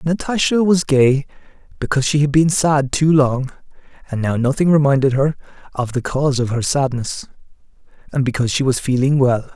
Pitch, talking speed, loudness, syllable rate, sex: 140 Hz, 170 wpm, -17 LUFS, 5.5 syllables/s, male